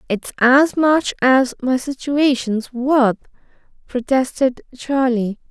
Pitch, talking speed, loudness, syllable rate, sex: 260 Hz, 100 wpm, -17 LUFS, 3.4 syllables/s, female